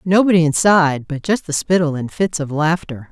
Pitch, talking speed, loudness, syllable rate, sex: 165 Hz, 195 wpm, -17 LUFS, 5.3 syllables/s, female